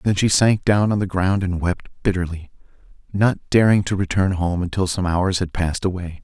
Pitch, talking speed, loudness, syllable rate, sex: 95 Hz, 200 wpm, -20 LUFS, 5.3 syllables/s, male